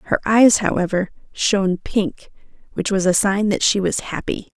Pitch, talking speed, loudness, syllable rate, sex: 200 Hz, 170 wpm, -18 LUFS, 4.7 syllables/s, female